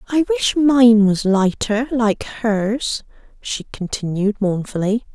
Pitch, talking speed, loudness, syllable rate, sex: 225 Hz, 115 wpm, -18 LUFS, 3.5 syllables/s, female